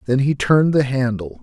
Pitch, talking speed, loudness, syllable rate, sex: 130 Hz, 210 wpm, -17 LUFS, 5.6 syllables/s, male